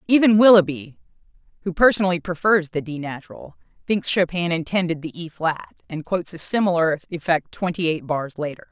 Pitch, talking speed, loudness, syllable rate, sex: 175 Hz, 160 wpm, -20 LUFS, 5.5 syllables/s, female